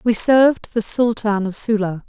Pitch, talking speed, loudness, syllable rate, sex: 220 Hz, 175 wpm, -17 LUFS, 4.6 syllables/s, female